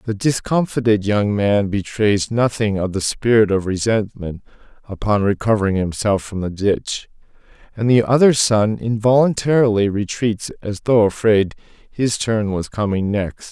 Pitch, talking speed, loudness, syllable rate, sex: 105 Hz, 140 wpm, -18 LUFS, 4.5 syllables/s, male